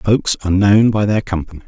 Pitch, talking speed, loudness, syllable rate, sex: 100 Hz, 215 wpm, -15 LUFS, 6.2 syllables/s, male